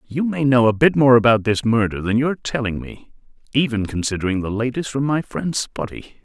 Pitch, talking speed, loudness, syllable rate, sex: 120 Hz, 200 wpm, -19 LUFS, 5.5 syllables/s, male